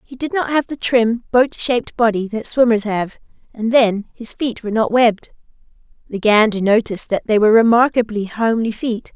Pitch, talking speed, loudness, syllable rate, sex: 230 Hz, 185 wpm, -17 LUFS, 5.5 syllables/s, female